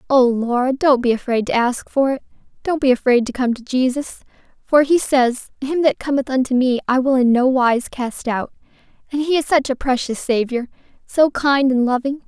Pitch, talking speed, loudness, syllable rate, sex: 260 Hz, 200 wpm, -18 LUFS, 5.2 syllables/s, female